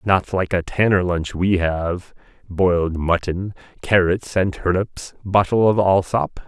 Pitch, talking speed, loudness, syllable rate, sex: 90 Hz, 140 wpm, -19 LUFS, 3.9 syllables/s, male